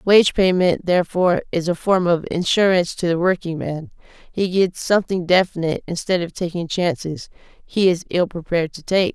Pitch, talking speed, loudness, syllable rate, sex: 175 Hz, 165 wpm, -19 LUFS, 5.4 syllables/s, female